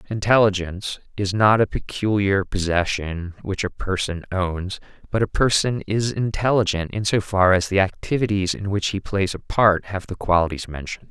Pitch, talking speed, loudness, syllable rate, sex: 100 Hz, 165 wpm, -21 LUFS, 5.0 syllables/s, male